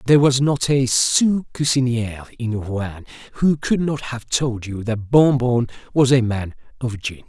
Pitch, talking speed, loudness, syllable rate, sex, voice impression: 125 Hz, 180 wpm, -19 LUFS, 4.3 syllables/s, male, masculine, adult-like, tensed, powerful, hard, slightly muffled, raspy, intellectual, mature, wild, strict